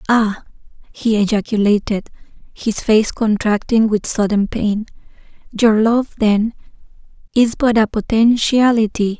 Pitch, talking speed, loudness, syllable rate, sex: 220 Hz, 105 wpm, -16 LUFS, 4.1 syllables/s, female